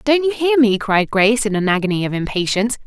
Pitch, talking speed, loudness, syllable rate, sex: 220 Hz, 230 wpm, -17 LUFS, 6.3 syllables/s, female